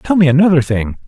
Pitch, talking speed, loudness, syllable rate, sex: 150 Hz, 225 wpm, -13 LUFS, 6.2 syllables/s, male